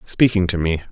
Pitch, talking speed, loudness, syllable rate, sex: 95 Hz, 195 wpm, -18 LUFS, 5.6 syllables/s, male